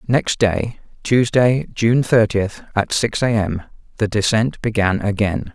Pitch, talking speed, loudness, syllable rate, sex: 110 Hz, 140 wpm, -18 LUFS, 3.9 syllables/s, male